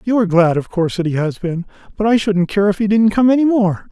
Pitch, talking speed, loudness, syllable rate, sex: 200 Hz, 290 wpm, -15 LUFS, 6.3 syllables/s, male